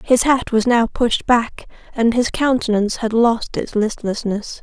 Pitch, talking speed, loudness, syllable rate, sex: 230 Hz, 170 wpm, -18 LUFS, 4.2 syllables/s, female